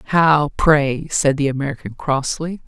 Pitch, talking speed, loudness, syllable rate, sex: 145 Hz, 135 wpm, -18 LUFS, 4.3 syllables/s, female